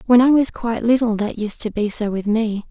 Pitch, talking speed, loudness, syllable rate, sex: 225 Hz, 265 wpm, -19 LUFS, 5.5 syllables/s, female